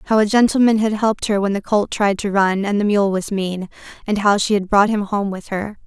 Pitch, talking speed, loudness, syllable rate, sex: 205 Hz, 265 wpm, -18 LUFS, 5.5 syllables/s, female